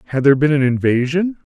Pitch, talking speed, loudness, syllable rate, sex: 145 Hz, 195 wpm, -16 LUFS, 6.8 syllables/s, male